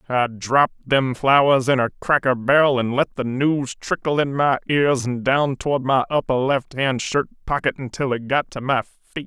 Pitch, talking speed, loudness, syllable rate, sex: 135 Hz, 200 wpm, -20 LUFS, 4.9 syllables/s, male